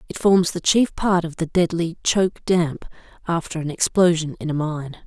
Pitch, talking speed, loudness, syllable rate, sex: 165 Hz, 190 wpm, -21 LUFS, 4.8 syllables/s, female